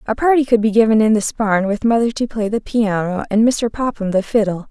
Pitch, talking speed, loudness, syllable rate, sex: 220 Hz, 240 wpm, -16 LUFS, 5.6 syllables/s, female